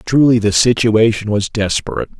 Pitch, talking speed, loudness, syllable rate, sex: 110 Hz, 135 wpm, -14 LUFS, 5.5 syllables/s, male